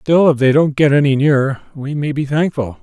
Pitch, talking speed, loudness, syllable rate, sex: 145 Hz, 235 wpm, -15 LUFS, 5.3 syllables/s, male